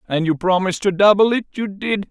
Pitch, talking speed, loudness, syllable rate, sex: 195 Hz, 200 wpm, -17 LUFS, 5.8 syllables/s, male